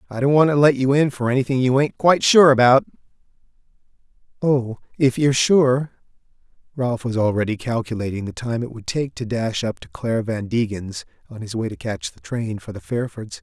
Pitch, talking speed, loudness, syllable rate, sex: 120 Hz, 195 wpm, -20 LUFS, 5.6 syllables/s, male